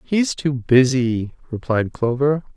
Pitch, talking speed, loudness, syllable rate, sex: 135 Hz, 115 wpm, -19 LUFS, 3.6 syllables/s, male